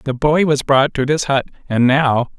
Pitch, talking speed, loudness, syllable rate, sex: 140 Hz, 225 wpm, -16 LUFS, 4.5 syllables/s, male